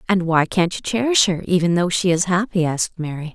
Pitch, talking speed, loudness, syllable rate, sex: 180 Hz, 235 wpm, -19 LUFS, 5.7 syllables/s, female